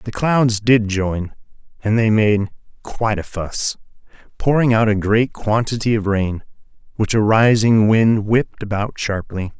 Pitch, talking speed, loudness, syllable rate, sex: 110 Hz, 150 wpm, -17 LUFS, 4.2 syllables/s, male